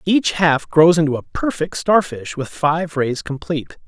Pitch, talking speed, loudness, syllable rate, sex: 160 Hz, 170 wpm, -18 LUFS, 4.4 syllables/s, male